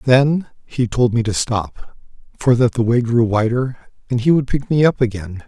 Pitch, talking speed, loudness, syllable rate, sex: 120 Hz, 210 wpm, -17 LUFS, 4.6 syllables/s, male